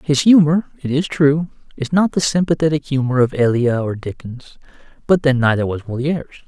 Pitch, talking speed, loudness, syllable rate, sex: 140 Hz, 175 wpm, -17 LUFS, 5.5 syllables/s, male